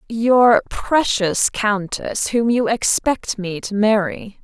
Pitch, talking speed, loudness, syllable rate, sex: 220 Hz, 120 wpm, -18 LUFS, 3.1 syllables/s, female